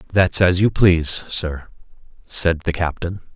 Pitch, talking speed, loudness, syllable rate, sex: 85 Hz, 145 wpm, -18 LUFS, 4.1 syllables/s, male